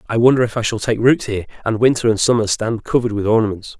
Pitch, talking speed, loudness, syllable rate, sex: 110 Hz, 255 wpm, -17 LUFS, 7.1 syllables/s, male